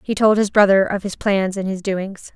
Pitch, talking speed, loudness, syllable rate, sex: 195 Hz, 255 wpm, -18 LUFS, 4.9 syllables/s, female